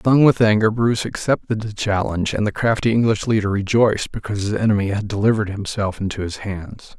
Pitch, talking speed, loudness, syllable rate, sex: 105 Hz, 190 wpm, -19 LUFS, 6.1 syllables/s, male